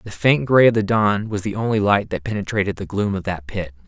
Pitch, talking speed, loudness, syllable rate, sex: 105 Hz, 265 wpm, -20 LUFS, 5.8 syllables/s, male